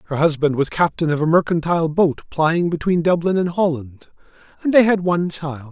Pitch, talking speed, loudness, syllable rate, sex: 160 Hz, 190 wpm, -18 LUFS, 5.5 syllables/s, male